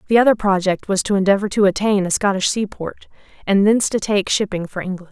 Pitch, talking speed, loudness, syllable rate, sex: 200 Hz, 210 wpm, -18 LUFS, 6.2 syllables/s, female